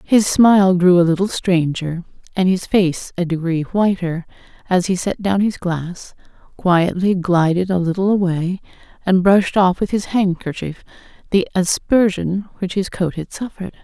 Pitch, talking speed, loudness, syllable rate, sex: 185 Hz, 155 wpm, -17 LUFS, 4.6 syllables/s, female